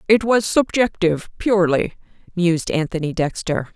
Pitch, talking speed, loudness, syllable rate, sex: 185 Hz, 110 wpm, -19 LUFS, 5.2 syllables/s, female